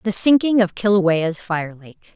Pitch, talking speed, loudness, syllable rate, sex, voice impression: 190 Hz, 165 wpm, -17 LUFS, 3.9 syllables/s, female, feminine, adult-like, tensed, powerful, slightly hard, fluent, nasal, intellectual, calm, slightly lively, strict, sharp